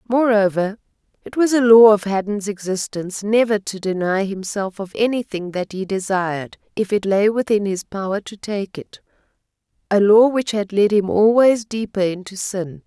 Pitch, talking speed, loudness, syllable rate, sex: 205 Hz, 165 wpm, -18 LUFS, 4.8 syllables/s, female